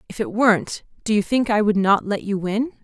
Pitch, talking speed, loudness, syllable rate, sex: 215 Hz, 255 wpm, -20 LUFS, 5.5 syllables/s, female